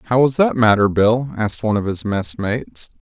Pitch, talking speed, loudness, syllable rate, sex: 110 Hz, 200 wpm, -18 LUFS, 5.7 syllables/s, male